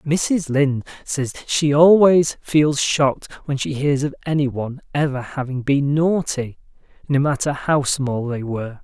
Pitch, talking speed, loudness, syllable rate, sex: 140 Hz, 150 wpm, -19 LUFS, 4.3 syllables/s, male